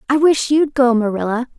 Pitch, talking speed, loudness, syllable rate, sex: 260 Hz, 190 wpm, -16 LUFS, 5.2 syllables/s, female